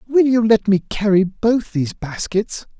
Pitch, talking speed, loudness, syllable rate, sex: 205 Hz, 170 wpm, -18 LUFS, 4.3 syllables/s, male